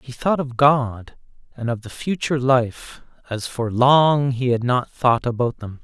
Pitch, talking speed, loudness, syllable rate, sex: 125 Hz, 185 wpm, -20 LUFS, 4.1 syllables/s, male